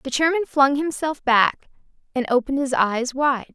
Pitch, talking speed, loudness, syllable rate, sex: 270 Hz, 170 wpm, -21 LUFS, 4.8 syllables/s, female